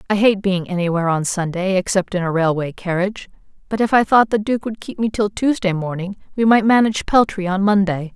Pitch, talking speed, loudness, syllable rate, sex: 195 Hz, 215 wpm, -18 LUFS, 5.8 syllables/s, female